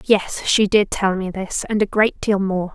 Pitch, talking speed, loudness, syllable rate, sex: 200 Hz, 240 wpm, -19 LUFS, 4.3 syllables/s, female